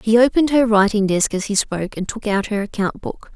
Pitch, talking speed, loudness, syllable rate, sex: 215 Hz, 250 wpm, -18 LUFS, 5.8 syllables/s, female